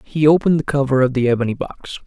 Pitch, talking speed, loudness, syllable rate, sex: 140 Hz, 230 wpm, -17 LUFS, 6.7 syllables/s, male